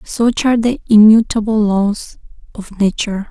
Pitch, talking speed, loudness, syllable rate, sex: 215 Hz, 125 wpm, -13 LUFS, 4.7 syllables/s, female